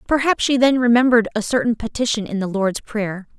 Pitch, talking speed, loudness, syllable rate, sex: 230 Hz, 195 wpm, -18 LUFS, 5.8 syllables/s, female